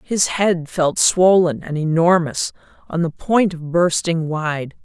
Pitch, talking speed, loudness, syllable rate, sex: 170 Hz, 150 wpm, -18 LUFS, 3.7 syllables/s, female